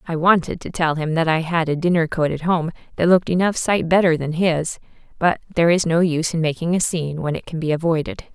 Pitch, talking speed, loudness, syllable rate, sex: 165 Hz, 245 wpm, -19 LUFS, 6.1 syllables/s, female